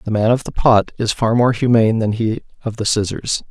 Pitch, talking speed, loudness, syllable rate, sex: 115 Hz, 240 wpm, -17 LUFS, 5.5 syllables/s, male